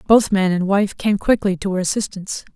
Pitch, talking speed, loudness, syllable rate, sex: 195 Hz, 210 wpm, -19 LUFS, 5.6 syllables/s, female